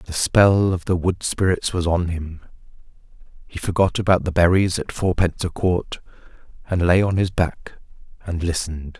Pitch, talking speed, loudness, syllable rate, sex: 90 Hz, 165 wpm, -20 LUFS, 4.8 syllables/s, male